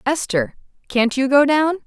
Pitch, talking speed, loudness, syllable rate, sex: 270 Hz, 160 wpm, -18 LUFS, 4.4 syllables/s, female